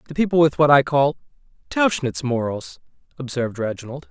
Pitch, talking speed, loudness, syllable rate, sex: 140 Hz, 145 wpm, -20 LUFS, 5.6 syllables/s, male